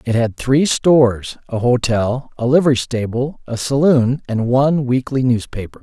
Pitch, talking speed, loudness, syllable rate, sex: 125 Hz, 155 wpm, -16 LUFS, 4.6 syllables/s, male